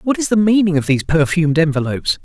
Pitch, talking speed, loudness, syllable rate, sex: 170 Hz, 215 wpm, -15 LUFS, 6.9 syllables/s, male